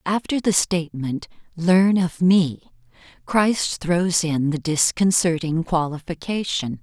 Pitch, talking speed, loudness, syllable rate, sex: 170 Hz, 105 wpm, -21 LUFS, 3.7 syllables/s, female